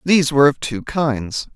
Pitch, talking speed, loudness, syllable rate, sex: 140 Hz, 195 wpm, -18 LUFS, 4.9 syllables/s, male